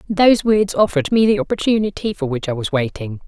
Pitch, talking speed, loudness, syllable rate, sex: 185 Hz, 200 wpm, -17 LUFS, 6.2 syllables/s, female